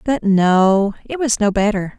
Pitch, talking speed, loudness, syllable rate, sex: 210 Hz, 180 wpm, -16 LUFS, 3.9 syllables/s, female